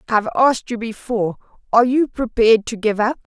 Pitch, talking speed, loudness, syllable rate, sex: 230 Hz, 180 wpm, -18 LUFS, 6.4 syllables/s, female